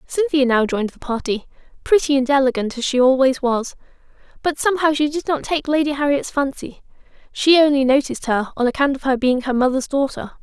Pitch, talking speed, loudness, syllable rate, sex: 275 Hz, 190 wpm, -18 LUFS, 5.9 syllables/s, female